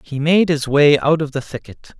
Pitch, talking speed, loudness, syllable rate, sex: 145 Hz, 240 wpm, -16 LUFS, 4.8 syllables/s, male